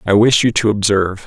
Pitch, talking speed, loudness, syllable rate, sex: 105 Hz, 240 wpm, -14 LUFS, 6.1 syllables/s, male